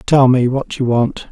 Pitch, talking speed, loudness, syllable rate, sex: 130 Hz, 230 wpm, -15 LUFS, 4.2 syllables/s, male